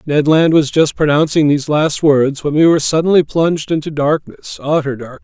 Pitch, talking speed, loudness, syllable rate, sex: 150 Hz, 195 wpm, -14 LUFS, 5.5 syllables/s, male